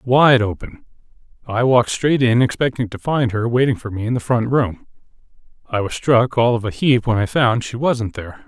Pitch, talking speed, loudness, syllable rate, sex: 115 Hz, 200 wpm, -18 LUFS, 5.2 syllables/s, male